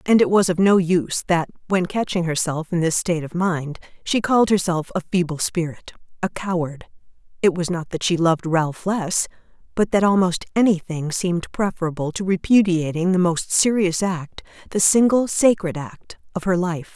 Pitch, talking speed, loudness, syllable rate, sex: 175 Hz, 170 wpm, -20 LUFS, 5.0 syllables/s, female